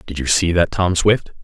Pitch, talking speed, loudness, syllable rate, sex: 90 Hz, 250 wpm, -17 LUFS, 4.8 syllables/s, male